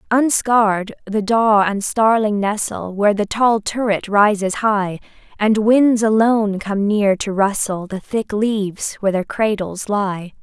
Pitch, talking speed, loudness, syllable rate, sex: 210 Hz, 150 wpm, -17 LUFS, 4.1 syllables/s, female